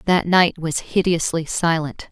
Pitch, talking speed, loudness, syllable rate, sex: 165 Hz, 140 wpm, -19 LUFS, 4.1 syllables/s, female